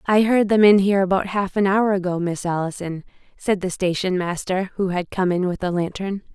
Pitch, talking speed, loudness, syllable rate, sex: 190 Hz, 220 wpm, -21 LUFS, 5.3 syllables/s, female